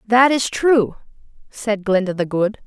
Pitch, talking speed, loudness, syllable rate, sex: 220 Hz, 160 wpm, -18 LUFS, 4.0 syllables/s, female